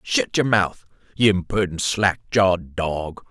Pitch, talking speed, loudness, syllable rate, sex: 95 Hz, 145 wpm, -21 LUFS, 4.0 syllables/s, male